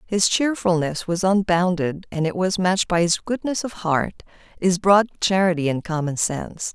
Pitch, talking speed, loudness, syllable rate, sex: 180 Hz, 170 wpm, -21 LUFS, 4.8 syllables/s, female